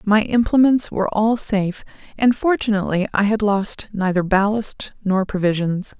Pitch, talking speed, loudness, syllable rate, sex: 205 Hz, 140 wpm, -19 LUFS, 4.8 syllables/s, female